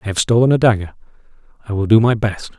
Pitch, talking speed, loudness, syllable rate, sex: 105 Hz, 210 wpm, -15 LUFS, 7.1 syllables/s, male